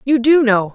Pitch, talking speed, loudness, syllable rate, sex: 250 Hz, 240 wpm, -13 LUFS, 4.8 syllables/s, female